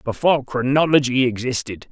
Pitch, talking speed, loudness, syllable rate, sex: 130 Hz, 95 wpm, -19 LUFS, 5.4 syllables/s, male